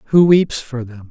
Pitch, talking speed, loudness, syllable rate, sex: 135 Hz, 220 wpm, -14 LUFS, 4.7 syllables/s, male